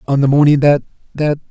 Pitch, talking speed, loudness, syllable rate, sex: 145 Hz, 160 wpm, -13 LUFS, 6.5 syllables/s, male